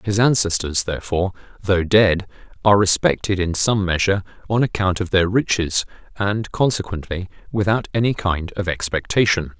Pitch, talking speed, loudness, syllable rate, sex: 95 Hz, 140 wpm, -19 LUFS, 5.3 syllables/s, male